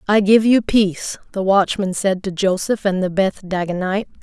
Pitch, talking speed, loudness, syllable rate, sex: 195 Hz, 185 wpm, -18 LUFS, 5.1 syllables/s, female